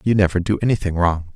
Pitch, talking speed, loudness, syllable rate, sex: 95 Hz, 220 wpm, -19 LUFS, 6.4 syllables/s, male